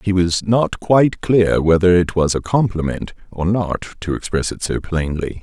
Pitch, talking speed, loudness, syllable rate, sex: 95 Hz, 190 wpm, -17 LUFS, 4.6 syllables/s, male